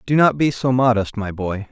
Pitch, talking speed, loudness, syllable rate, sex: 120 Hz, 245 wpm, -18 LUFS, 5.0 syllables/s, male